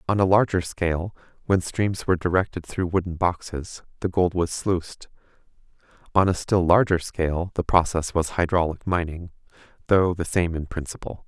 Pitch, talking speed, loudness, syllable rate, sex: 90 Hz, 160 wpm, -23 LUFS, 5.2 syllables/s, male